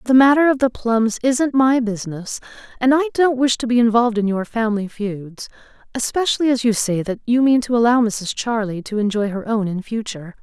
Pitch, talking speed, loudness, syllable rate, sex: 230 Hz, 205 wpm, -18 LUFS, 5.6 syllables/s, female